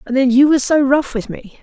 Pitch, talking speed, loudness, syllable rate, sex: 265 Hz, 295 wpm, -14 LUFS, 5.3 syllables/s, female